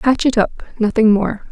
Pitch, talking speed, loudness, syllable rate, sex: 225 Hz, 200 wpm, -16 LUFS, 5.1 syllables/s, female